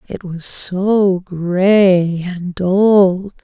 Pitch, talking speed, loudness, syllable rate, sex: 185 Hz, 105 wpm, -14 LUFS, 1.9 syllables/s, female